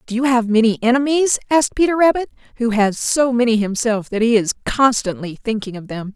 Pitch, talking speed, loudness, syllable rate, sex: 235 Hz, 195 wpm, -17 LUFS, 5.7 syllables/s, female